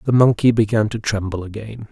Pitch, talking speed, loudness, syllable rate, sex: 110 Hz, 190 wpm, -18 LUFS, 5.7 syllables/s, male